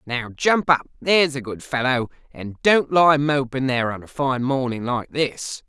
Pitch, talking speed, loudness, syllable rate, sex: 135 Hz, 190 wpm, -21 LUFS, 4.5 syllables/s, male